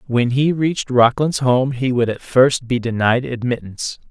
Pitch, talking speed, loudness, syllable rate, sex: 125 Hz, 175 wpm, -17 LUFS, 4.7 syllables/s, male